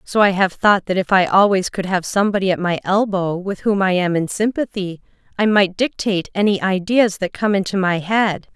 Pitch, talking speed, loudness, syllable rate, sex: 195 Hz, 210 wpm, -18 LUFS, 5.3 syllables/s, female